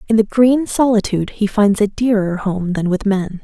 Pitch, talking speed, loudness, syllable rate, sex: 210 Hz, 210 wpm, -16 LUFS, 4.9 syllables/s, female